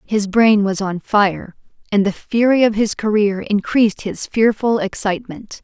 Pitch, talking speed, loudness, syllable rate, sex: 210 Hz, 160 wpm, -17 LUFS, 4.5 syllables/s, female